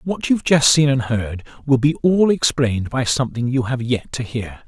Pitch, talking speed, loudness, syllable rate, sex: 130 Hz, 220 wpm, -18 LUFS, 5.1 syllables/s, male